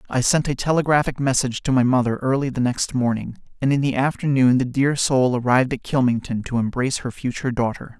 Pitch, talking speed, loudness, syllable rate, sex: 130 Hz, 205 wpm, -20 LUFS, 6.0 syllables/s, male